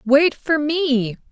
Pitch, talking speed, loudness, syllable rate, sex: 285 Hz, 135 wpm, -18 LUFS, 2.7 syllables/s, female